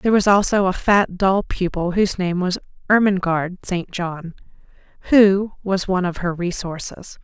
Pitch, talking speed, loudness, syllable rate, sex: 185 Hz, 160 wpm, -19 LUFS, 4.9 syllables/s, female